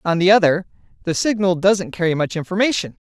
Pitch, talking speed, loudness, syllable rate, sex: 185 Hz, 175 wpm, -18 LUFS, 6.0 syllables/s, female